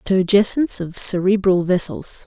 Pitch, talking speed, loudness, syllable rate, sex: 190 Hz, 105 wpm, -17 LUFS, 4.6 syllables/s, female